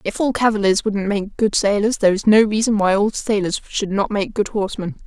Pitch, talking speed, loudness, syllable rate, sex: 205 Hz, 225 wpm, -18 LUFS, 5.6 syllables/s, female